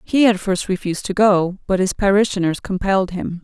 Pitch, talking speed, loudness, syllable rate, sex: 190 Hz, 190 wpm, -18 LUFS, 5.5 syllables/s, female